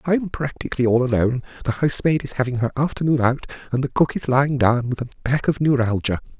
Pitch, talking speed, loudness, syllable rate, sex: 130 Hz, 205 wpm, -21 LUFS, 6.6 syllables/s, male